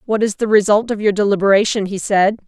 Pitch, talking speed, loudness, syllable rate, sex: 205 Hz, 220 wpm, -16 LUFS, 6.1 syllables/s, female